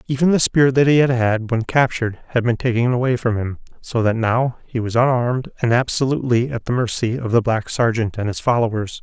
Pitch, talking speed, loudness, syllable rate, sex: 120 Hz, 220 wpm, -19 LUFS, 5.7 syllables/s, male